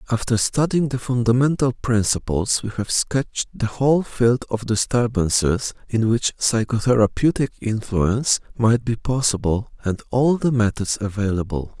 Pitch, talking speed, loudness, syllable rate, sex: 115 Hz, 125 wpm, -20 LUFS, 4.7 syllables/s, male